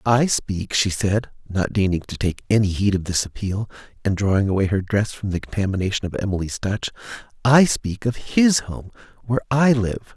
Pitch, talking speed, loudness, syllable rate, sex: 105 Hz, 185 wpm, -21 LUFS, 5.2 syllables/s, male